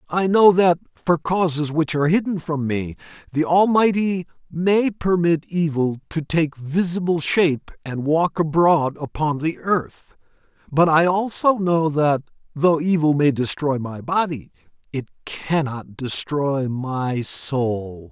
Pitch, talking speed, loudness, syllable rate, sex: 155 Hz, 135 wpm, -20 LUFS, 3.9 syllables/s, male